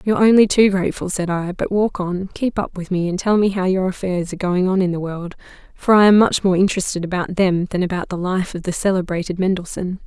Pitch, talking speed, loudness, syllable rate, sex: 185 Hz, 240 wpm, -18 LUFS, 6.0 syllables/s, female